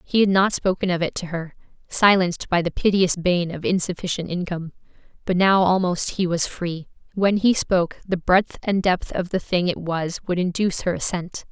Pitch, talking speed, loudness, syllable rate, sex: 180 Hz, 200 wpm, -21 LUFS, 5.2 syllables/s, female